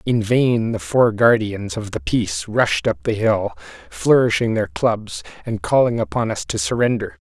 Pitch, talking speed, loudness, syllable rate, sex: 115 Hz, 175 wpm, -19 LUFS, 4.4 syllables/s, male